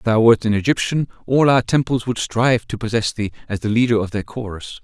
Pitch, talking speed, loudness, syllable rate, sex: 115 Hz, 235 wpm, -19 LUFS, 5.9 syllables/s, male